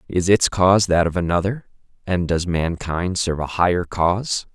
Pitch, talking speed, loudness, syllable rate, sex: 90 Hz, 170 wpm, -20 LUFS, 5.1 syllables/s, male